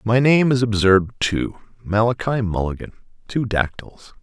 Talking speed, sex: 130 wpm, male